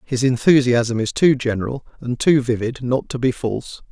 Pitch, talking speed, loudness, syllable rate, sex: 125 Hz, 185 wpm, -19 LUFS, 5.0 syllables/s, male